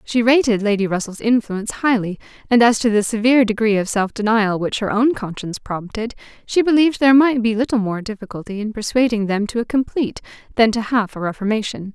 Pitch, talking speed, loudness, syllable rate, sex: 220 Hz, 195 wpm, -18 LUFS, 6.1 syllables/s, female